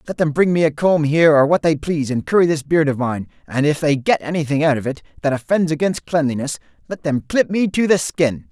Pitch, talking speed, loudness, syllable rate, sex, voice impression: 150 Hz, 255 wpm, -18 LUFS, 5.9 syllables/s, male, masculine, adult-like, slightly middle-aged, tensed, powerful, bright, slightly soft, clear, very fluent, cool, slightly intellectual, refreshing, calm, slightly mature, slightly friendly, reassuring, slightly wild, slightly sweet, lively, kind, slightly intense